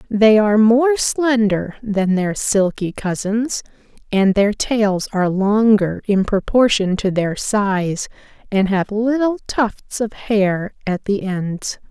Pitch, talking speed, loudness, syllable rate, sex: 210 Hz, 135 wpm, -18 LUFS, 3.4 syllables/s, female